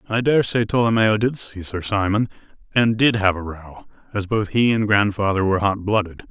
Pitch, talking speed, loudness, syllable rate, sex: 105 Hz, 190 wpm, -20 LUFS, 5.4 syllables/s, male